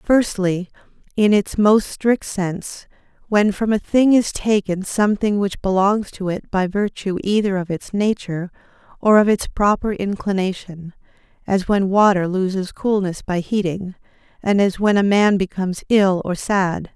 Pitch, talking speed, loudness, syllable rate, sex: 195 Hz, 155 wpm, -19 LUFS, 4.5 syllables/s, female